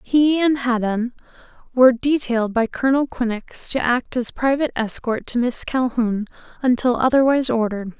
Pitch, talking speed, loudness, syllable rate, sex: 245 Hz, 145 wpm, -20 LUFS, 5.3 syllables/s, female